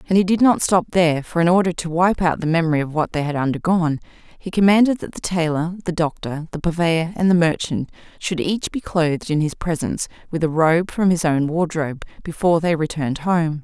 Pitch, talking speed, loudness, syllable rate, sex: 170 Hz, 215 wpm, -20 LUFS, 5.8 syllables/s, female